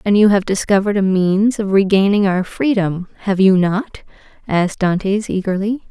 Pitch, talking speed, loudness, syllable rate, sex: 195 Hz, 165 wpm, -16 LUFS, 5.0 syllables/s, female